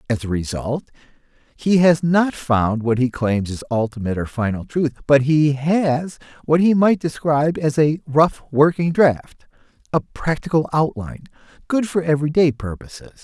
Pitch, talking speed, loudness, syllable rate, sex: 145 Hz, 155 wpm, -19 LUFS, 4.6 syllables/s, male